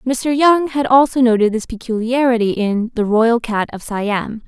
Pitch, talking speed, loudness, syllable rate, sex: 235 Hz, 175 wpm, -16 LUFS, 4.4 syllables/s, female